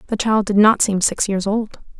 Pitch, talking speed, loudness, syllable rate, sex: 205 Hz, 240 wpm, -17 LUFS, 5.0 syllables/s, female